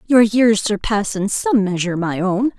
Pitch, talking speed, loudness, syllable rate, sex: 210 Hz, 185 wpm, -17 LUFS, 4.5 syllables/s, female